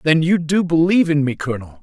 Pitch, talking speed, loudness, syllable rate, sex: 155 Hz, 230 wpm, -17 LUFS, 6.4 syllables/s, male